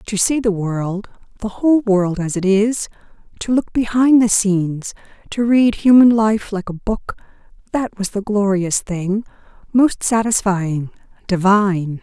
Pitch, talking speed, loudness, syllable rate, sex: 205 Hz, 145 wpm, -17 LUFS, 4.2 syllables/s, female